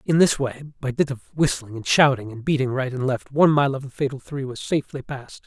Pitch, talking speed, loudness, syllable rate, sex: 135 Hz, 255 wpm, -22 LUFS, 6.2 syllables/s, male